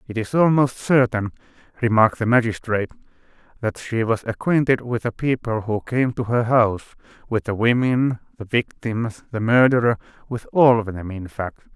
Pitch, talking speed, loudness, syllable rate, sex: 115 Hz, 155 wpm, -20 LUFS, 5.1 syllables/s, male